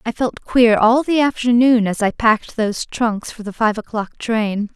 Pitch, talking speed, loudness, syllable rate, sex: 225 Hz, 200 wpm, -17 LUFS, 4.6 syllables/s, female